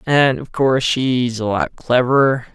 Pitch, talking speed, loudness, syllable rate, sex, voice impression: 125 Hz, 165 wpm, -17 LUFS, 4.2 syllables/s, male, masculine, adult-like, slightly muffled, slightly refreshing, unique